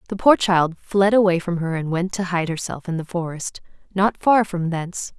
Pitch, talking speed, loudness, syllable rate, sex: 180 Hz, 220 wpm, -21 LUFS, 5.0 syllables/s, female